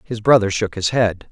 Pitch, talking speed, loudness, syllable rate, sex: 105 Hz, 230 wpm, -17 LUFS, 5.0 syllables/s, male